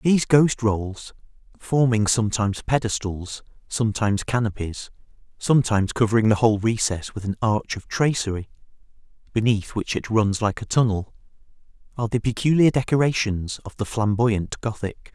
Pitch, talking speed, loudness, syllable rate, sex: 110 Hz, 130 wpm, -22 LUFS, 5.3 syllables/s, male